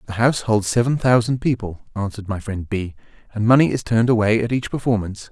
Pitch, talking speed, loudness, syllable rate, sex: 110 Hz, 205 wpm, -20 LUFS, 6.4 syllables/s, male